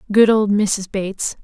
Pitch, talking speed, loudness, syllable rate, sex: 205 Hz, 165 wpm, -17 LUFS, 4.3 syllables/s, female